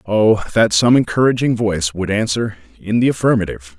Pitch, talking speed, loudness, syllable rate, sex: 105 Hz, 160 wpm, -16 LUFS, 5.7 syllables/s, male